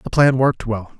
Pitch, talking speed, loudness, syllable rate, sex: 120 Hz, 240 wpm, -18 LUFS, 5.3 syllables/s, male